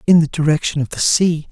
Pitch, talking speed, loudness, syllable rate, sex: 160 Hz, 235 wpm, -16 LUFS, 5.9 syllables/s, male